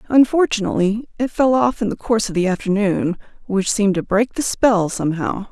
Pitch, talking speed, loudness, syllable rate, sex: 210 Hz, 185 wpm, -18 LUFS, 5.7 syllables/s, female